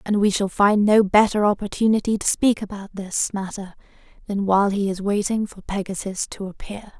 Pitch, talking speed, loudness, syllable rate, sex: 200 Hz, 180 wpm, -21 LUFS, 5.3 syllables/s, female